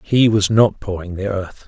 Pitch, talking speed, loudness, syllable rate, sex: 100 Hz, 215 wpm, -17 LUFS, 4.5 syllables/s, male